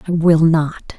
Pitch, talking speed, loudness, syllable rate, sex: 160 Hz, 180 wpm, -14 LUFS, 3.8 syllables/s, female